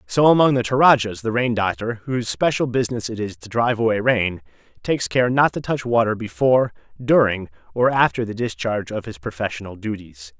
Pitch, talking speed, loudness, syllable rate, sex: 115 Hz, 185 wpm, -20 LUFS, 5.8 syllables/s, male